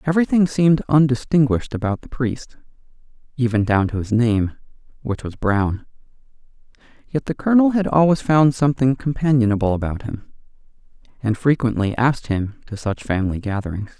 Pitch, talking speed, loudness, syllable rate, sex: 125 Hz, 135 wpm, -19 LUFS, 5.7 syllables/s, male